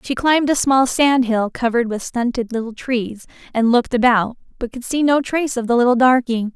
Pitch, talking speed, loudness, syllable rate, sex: 245 Hz, 210 wpm, -17 LUFS, 5.6 syllables/s, female